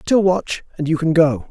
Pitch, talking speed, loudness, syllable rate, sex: 160 Hz, 240 wpm, -18 LUFS, 4.8 syllables/s, male